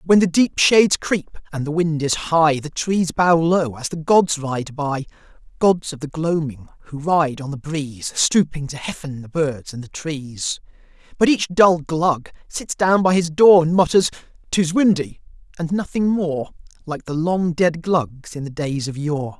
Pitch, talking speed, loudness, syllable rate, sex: 160 Hz, 190 wpm, -19 LUFS, 4.2 syllables/s, male